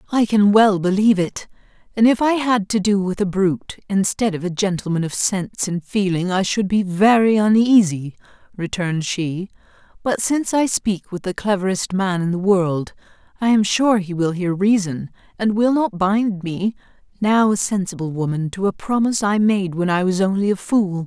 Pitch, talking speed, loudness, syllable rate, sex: 195 Hz, 190 wpm, -19 LUFS, 5.0 syllables/s, female